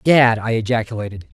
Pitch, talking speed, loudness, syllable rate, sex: 115 Hz, 130 wpm, -18 LUFS, 5.8 syllables/s, male